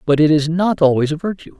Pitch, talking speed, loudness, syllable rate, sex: 160 Hz, 265 wpm, -16 LUFS, 6.1 syllables/s, male